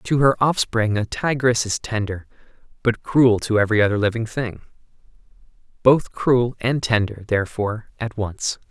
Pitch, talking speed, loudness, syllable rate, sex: 115 Hz, 140 wpm, -20 LUFS, 4.8 syllables/s, male